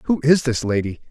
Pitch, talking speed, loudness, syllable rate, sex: 135 Hz, 215 wpm, -19 LUFS, 5.8 syllables/s, male